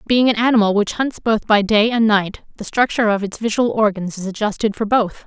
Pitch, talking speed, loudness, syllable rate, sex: 215 Hz, 230 wpm, -17 LUFS, 5.6 syllables/s, female